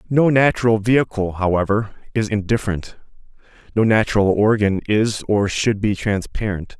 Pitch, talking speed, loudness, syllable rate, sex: 105 Hz, 125 wpm, -19 LUFS, 5.1 syllables/s, male